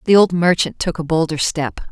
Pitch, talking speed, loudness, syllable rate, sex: 165 Hz, 220 wpm, -17 LUFS, 5.3 syllables/s, female